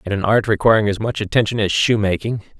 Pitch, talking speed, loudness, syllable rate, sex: 105 Hz, 210 wpm, -17 LUFS, 6.3 syllables/s, male